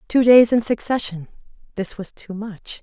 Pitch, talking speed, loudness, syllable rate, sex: 215 Hz, 150 wpm, -18 LUFS, 4.6 syllables/s, female